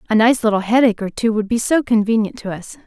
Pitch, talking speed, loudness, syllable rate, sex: 225 Hz, 250 wpm, -17 LUFS, 6.5 syllables/s, female